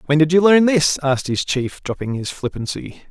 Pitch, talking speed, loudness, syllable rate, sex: 150 Hz, 210 wpm, -18 LUFS, 5.2 syllables/s, male